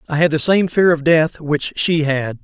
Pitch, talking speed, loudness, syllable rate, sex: 155 Hz, 245 wpm, -16 LUFS, 4.6 syllables/s, male